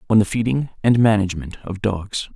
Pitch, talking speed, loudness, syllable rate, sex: 105 Hz, 180 wpm, -20 LUFS, 5.5 syllables/s, male